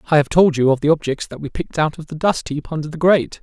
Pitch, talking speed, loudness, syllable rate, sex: 155 Hz, 315 wpm, -18 LUFS, 6.9 syllables/s, male